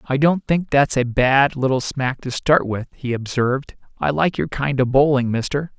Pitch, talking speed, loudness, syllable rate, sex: 135 Hz, 205 wpm, -19 LUFS, 4.6 syllables/s, male